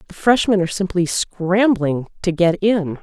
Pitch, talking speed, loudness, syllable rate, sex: 185 Hz, 160 wpm, -18 LUFS, 4.4 syllables/s, female